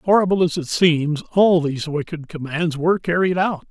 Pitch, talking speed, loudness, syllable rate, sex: 165 Hz, 180 wpm, -19 LUFS, 5.1 syllables/s, male